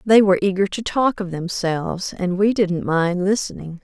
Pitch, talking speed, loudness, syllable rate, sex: 190 Hz, 190 wpm, -20 LUFS, 4.9 syllables/s, female